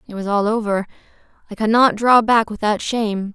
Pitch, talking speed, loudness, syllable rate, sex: 215 Hz, 195 wpm, -17 LUFS, 5.4 syllables/s, female